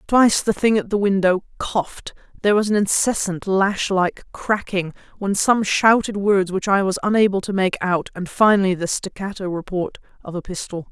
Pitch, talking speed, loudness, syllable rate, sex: 195 Hz, 180 wpm, -19 LUFS, 5.1 syllables/s, female